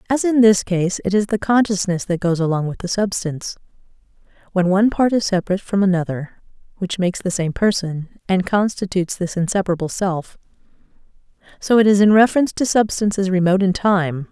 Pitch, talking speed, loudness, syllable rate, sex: 190 Hz, 170 wpm, -18 LUFS, 6.0 syllables/s, female